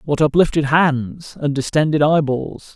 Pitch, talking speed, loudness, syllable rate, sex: 145 Hz, 130 wpm, -17 LUFS, 4.2 syllables/s, male